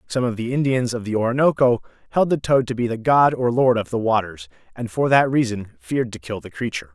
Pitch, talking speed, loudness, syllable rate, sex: 120 Hz, 240 wpm, -20 LUFS, 6.0 syllables/s, male